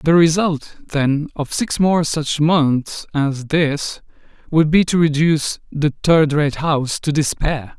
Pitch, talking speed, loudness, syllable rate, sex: 155 Hz, 155 wpm, -18 LUFS, 3.7 syllables/s, male